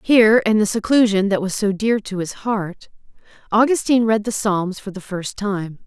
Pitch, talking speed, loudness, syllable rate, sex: 210 Hz, 195 wpm, -19 LUFS, 4.9 syllables/s, female